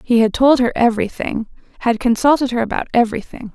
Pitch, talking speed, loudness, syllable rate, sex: 235 Hz, 170 wpm, -17 LUFS, 6.3 syllables/s, female